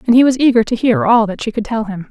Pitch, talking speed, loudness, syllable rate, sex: 225 Hz, 340 wpm, -14 LUFS, 6.5 syllables/s, female